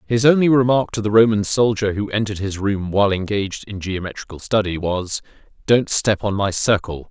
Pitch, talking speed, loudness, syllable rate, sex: 105 Hz, 185 wpm, -19 LUFS, 5.5 syllables/s, male